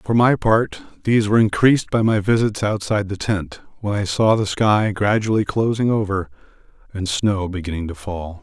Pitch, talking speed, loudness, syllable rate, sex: 105 Hz, 180 wpm, -19 LUFS, 5.2 syllables/s, male